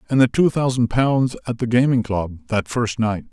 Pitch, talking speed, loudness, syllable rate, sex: 120 Hz, 200 wpm, -20 LUFS, 4.9 syllables/s, male